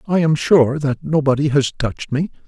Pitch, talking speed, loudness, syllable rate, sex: 145 Hz, 195 wpm, -17 LUFS, 5.1 syllables/s, male